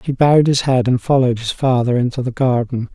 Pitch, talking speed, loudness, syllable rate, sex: 125 Hz, 225 wpm, -16 LUFS, 6.0 syllables/s, male